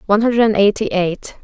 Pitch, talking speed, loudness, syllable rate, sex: 210 Hz, 165 wpm, -16 LUFS, 5.6 syllables/s, female